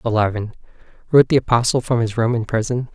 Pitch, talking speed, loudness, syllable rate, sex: 115 Hz, 165 wpm, -18 LUFS, 6.5 syllables/s, male